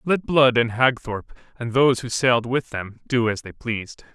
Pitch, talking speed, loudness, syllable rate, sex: 120 Hz, 205 wpm, -21 LUFS, 5.2 syllables/s, male